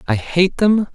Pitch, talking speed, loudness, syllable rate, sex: 175 Hz, 190 wpm, -16 LUFS, 4.1 syllables/s, male